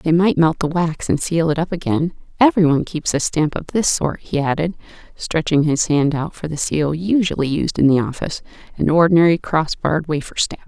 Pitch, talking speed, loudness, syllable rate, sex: 160 Hz, 210 wpm, -18 LUFS, 5.5 syllables/s, female